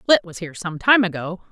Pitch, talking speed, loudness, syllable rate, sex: 185 Hz, 235 wpm, -19 LUFS, 5.8 syllables/s, female